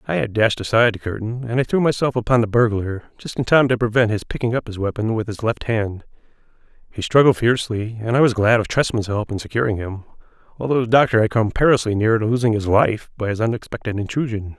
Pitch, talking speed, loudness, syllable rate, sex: 115 Hz, 225 wpm, -19 LUFS, 6.3 syllables/s, male